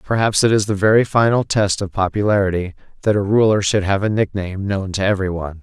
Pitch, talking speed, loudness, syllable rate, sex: 100 Hz, 215 wpm, -17 LUFS, 6.3 syllables/s, male